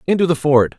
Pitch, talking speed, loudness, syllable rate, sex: 150 Hz, 230 wpm, -15 LUFS, 6.2 syllables/s, male